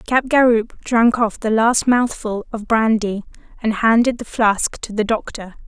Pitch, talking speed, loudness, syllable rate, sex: 225 Hz, 160 wpm, -17 LUFS, 4.4 syllables/s, female